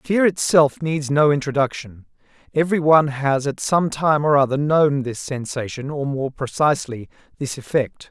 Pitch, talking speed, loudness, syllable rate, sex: 145 Hz, 150 wpm, -19 LUFS, 4.7 syllables/s, male